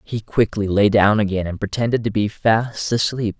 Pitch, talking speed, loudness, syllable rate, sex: 105 Hz, 195 wpm, -19 LUFS, 4.9 syllables/s, male